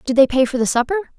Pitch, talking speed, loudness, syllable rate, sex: 275 Hz, 305 wpm, -17 LUFS, 8.1 syllables/s, female